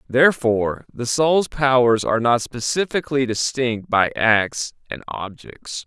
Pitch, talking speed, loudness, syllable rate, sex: 125 Hz, 125 wpm, -19 LUFS, 4.3 syllables/s, male